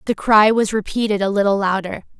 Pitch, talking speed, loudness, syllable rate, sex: 205 Hz, 190 wpm, -17 LUFS, 5.7 syllables/s, female